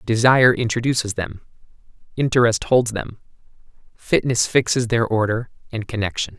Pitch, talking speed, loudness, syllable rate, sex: 115 Hz, 115 wpm, -19 LUFS, 5.2 syllables/s, male